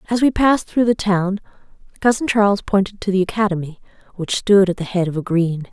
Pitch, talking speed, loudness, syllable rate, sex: 200 Hz, 210 wpm, -18 LUFS, 6.0 syllables/s, female